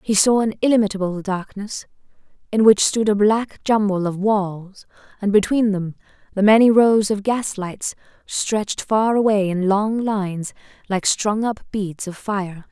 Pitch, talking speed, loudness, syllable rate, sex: 205 Hz, 155 wpm, -19 LUFS, 4.3 syllables/s, female